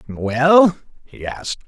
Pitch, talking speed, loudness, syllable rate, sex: 145 Hz, 105 wpm, -16 LUFS, 3.5 syllables/s, male